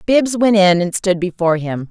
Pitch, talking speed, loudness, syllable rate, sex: 190 Hz, 220 wpm, -15 LUFS, 5.1 syllables/s, female